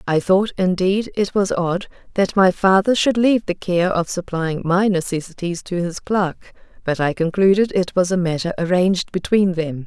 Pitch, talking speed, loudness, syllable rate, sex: 185 Hz, 185 wpm, -19 LUFS, 4.8 syllables/s, female